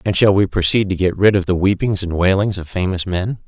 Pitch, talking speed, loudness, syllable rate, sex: 95 Hz, 260 wpm, -17 LUFS, 5.7 syllables/s, male